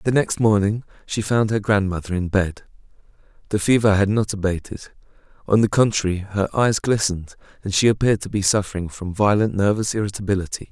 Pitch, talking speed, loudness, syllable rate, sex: 100 Hz, 170 wpm, -20 LUFS, 5.9 syllables/s, male